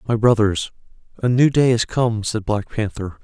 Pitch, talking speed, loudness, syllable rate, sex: 110 Hz, 185 wpm, -19 LUFS, 4.7 syllables/s, male